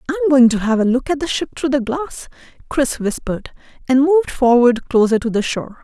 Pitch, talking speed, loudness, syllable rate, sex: 260 Hz, 215 wpm, -16 LUFS, 6.0 syllables/s, female